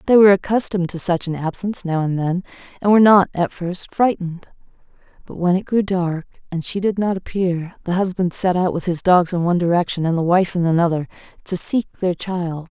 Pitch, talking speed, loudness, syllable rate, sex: 180 Hz, 210 wpm, -19 LUFS, 5.7 syllables/s, female